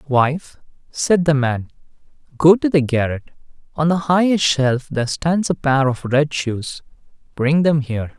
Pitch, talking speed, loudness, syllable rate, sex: 145 Hz, 155 wpm, -18 LUFS, 4.3 syllables/s, male